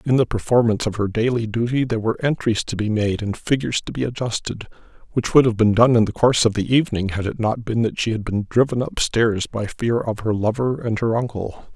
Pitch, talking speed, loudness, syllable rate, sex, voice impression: 115 Hz, 240 wpm, -20 LUFS, 6.0 syllables/s, male, very masculine, very adult-like, middle-aged, very thick, slightly relaxed, slightly weak, slightly dark, very hard, muffled, slightly fluent, very raspy, very cool, very intellectual, slightly refreshing, sincere, very calm, very mature, slightly wild, slightly sweet, slightly lively, kind, slightly modest